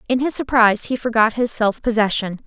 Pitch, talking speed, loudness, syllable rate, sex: 230 Hz, 195 wpm, -18 LUFS, 5.9 syllables/s, female